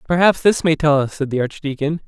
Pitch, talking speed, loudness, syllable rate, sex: 150 Hz, 230 wpm, -18 LUFS, 5.8 syllables/s, male